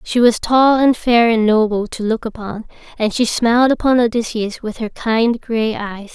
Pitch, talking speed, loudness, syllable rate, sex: 225 Hz, 195 wpm, -16 LUFS, 4.6 syllables/s, female